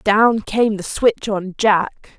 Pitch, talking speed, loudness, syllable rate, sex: 215 Hz, 165 wpm, -17 LUFS, 3.1 syllables/s, female